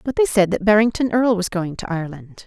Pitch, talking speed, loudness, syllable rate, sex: 200 Hz, 245 wpm, -19 LUFS, 6.3 syllables/s, female